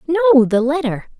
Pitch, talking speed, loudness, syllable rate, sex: 255 Hz, 150 wpm, -15 LUFS, 5.7 syllables/s, female